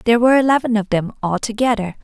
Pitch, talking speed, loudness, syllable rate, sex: 225 Hz, 175 wpm, -17 LUFS, 7.3 syllables/s, female